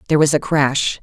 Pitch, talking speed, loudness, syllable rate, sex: 145 Hz, 235 wpm, -16 LUFS, 6.1 syllables/s, female